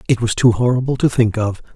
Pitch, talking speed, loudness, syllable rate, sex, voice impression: 115 Hz, 240 wpm, -16 LUFS, 6.1 syllables/s, male, very masculine, middle-aged, thick, tensed, slightly powerful, bright, slightly soft, clear, fluent, cool, very intellectual, refreshing, sincere, calm, mature, very friendly, very reassuring, unique, slightly elegant, wild, sweet, lively, kind, slightly intense